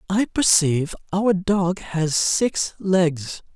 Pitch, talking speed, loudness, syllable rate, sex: 180 Hz, 120 wpm, -20 LUFS, 2.9 syllables/s, male